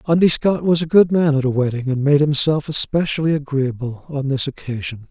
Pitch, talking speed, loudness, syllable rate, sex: 145 Hz, 200 wpm, -18 LUFS, 5.3 syllables/s, male